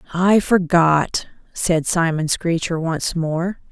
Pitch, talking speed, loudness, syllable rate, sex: 170 Hz, 115 wpm, -19 LUFS, 3.2 syllables/s, female